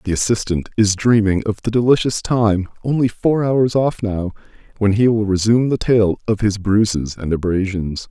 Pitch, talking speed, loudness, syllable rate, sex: 105 Hz, 165 wpm, -17 LUFS, 4.9 syllables/s, male